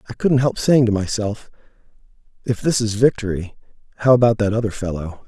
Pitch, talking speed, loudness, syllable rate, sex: 110 Hz, 170 wpm, -19 LUFS, 5.7 syllables/s, male